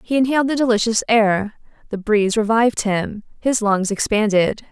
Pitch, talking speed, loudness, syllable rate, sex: 220 Hz, 155 wpm, -18 LUFS, 5.2 syllables/s, female